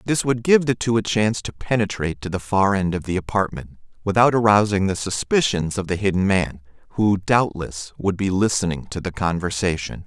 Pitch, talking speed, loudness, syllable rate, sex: 100 Hz, 190 wpm, -21 LUFS, 5.4 syllables/s, male